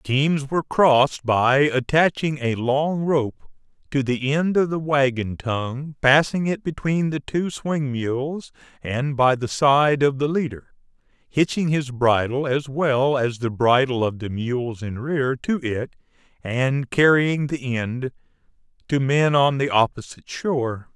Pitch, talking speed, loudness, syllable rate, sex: 135 Hz, 155 wpm, -21 LUFS, 3.9 syllables/s, male